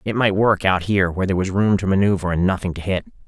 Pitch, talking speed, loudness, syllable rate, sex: 95 Hz, 275 wpm, -19 LUFS, 7.1 syllables/s, male